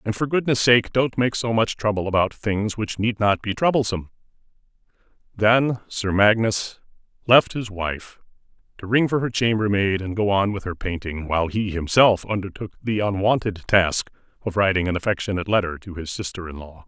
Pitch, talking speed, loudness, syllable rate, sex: 105 Hz, 180 wpm, -21 LUFS, 5.3 syllables/s, male